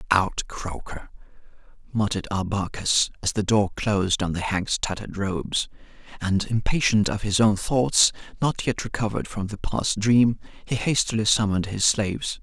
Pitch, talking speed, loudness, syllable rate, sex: 105 Hz, 150 wpm, -23 LUFS, 4.9 syllables/s, male